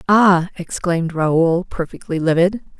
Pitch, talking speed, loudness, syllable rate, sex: 175 Hz, 110 wpm, -18 LUFS, 4.3 syllables/s, female